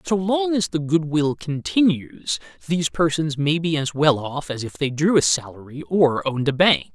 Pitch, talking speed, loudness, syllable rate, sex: 150 Hz, 205 wpm, -21 LUFS, 4.7 syllables/s, male